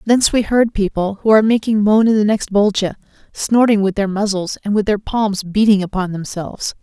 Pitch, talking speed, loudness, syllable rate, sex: 205 Hz, 200 wpm, -16 LUFS, 5.4 syllables/s, female